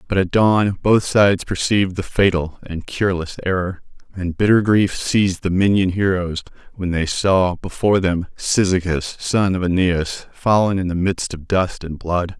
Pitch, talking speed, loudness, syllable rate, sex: 95 Hz, 170 wpm, -18 LUFS, 4.6 syllables/s, male